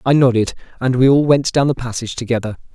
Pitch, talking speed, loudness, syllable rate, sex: 125 Hz, 220 wpm, -16 LUFS, 6.7 syllables/s, male